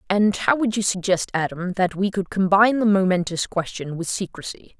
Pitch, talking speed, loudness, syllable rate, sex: 190 Hz, 190 wpm, -21 LUFS, 5.3 syllables/s, female